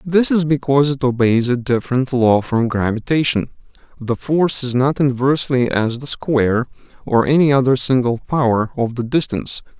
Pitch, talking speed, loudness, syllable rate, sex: 130 Hz, 155 wpm, -17 LUFS, 5.3 syllables/s, male